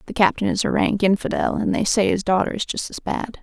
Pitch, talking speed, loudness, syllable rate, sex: 200 Hz, 265 wpm, -21 LUFS, 5.8 syllables/s, female